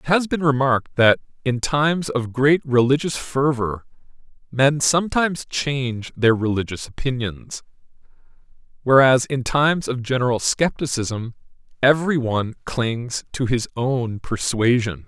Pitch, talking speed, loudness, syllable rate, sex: 130 Hz, 115 wpm, -20 LUFS, 4.4 syllables/s, male